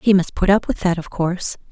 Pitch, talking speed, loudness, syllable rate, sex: 185 Hz, 280 wpm, -19 LUFS, 6.0 syllables/s, female